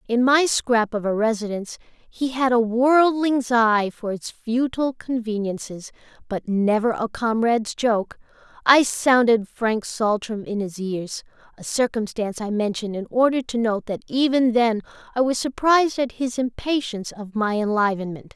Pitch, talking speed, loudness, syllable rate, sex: 230 Hz, 145 wpm, -22 LUFS, 4.6 syllables/s, female